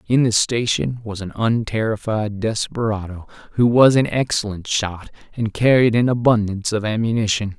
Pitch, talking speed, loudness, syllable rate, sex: 110 Hz, 140 wpm, -19 LUFS, 5.0 syllables/s, male